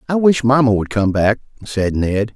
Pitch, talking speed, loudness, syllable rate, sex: 115 Hz, 205 wpm, -16 LUFS, 4.8 syllables/s, male